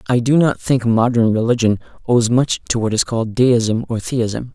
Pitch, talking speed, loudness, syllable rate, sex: 115 Hz, 200 wpm, -17 LUFS, 4.8 syllables/s, male